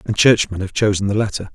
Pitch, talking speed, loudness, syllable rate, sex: 100 Hz, 235 wpm, -17 LUFS, 6.3 syllables/s, male